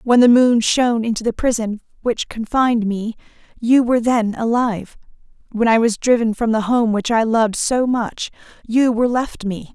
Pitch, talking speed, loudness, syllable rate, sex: 230 Hz, 185 wpm, -17 LUFS, 5.1 syllables/s, female